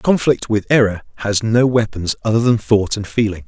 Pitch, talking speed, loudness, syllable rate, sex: 110 Hz, 190 wpm, -17 LUFS, 5.1 syllables/s, male